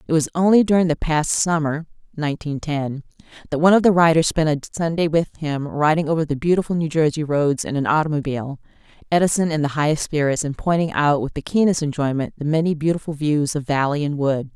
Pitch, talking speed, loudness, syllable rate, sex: 155 Hz, 200 wpm, -20 LUFS, 6.0 syllables/s, female